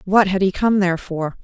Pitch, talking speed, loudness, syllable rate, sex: 190 Hz, 250 wpm, -18 LUFS, 5.4 syllables/s, female